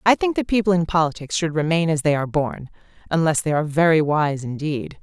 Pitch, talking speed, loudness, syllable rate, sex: 160 Hz, 205 wpm, -20 LUFS, 6.0 syllables/s, female